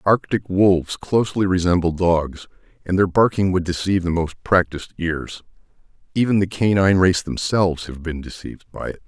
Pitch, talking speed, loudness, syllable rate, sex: 90 Hz, 160 wpm, -20 LUFS, 5.4 syllables/s, male